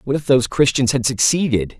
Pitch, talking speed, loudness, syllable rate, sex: 130 Hz, 200 wpm, -17 LUFS, 5.9 syllables/s, male